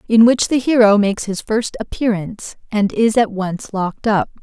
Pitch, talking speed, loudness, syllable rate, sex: 215 Hz, 190 wpm, -17 LUFS, 5.0 syllables/s, female